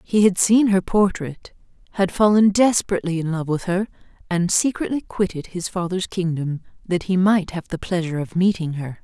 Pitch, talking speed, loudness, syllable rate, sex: 185 Hz, 180 wpm, -20 LUFS, 5.3 syllables/s, female